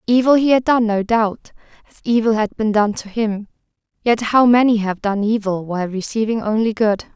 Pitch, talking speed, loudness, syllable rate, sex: 220 Hz, 195 wpm, -17 LUFS, 5.2 syllables/s, female